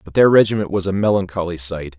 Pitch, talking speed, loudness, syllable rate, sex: 95 Hz, 210 wpm, -17 LUFS, 6.4 syllables/s, male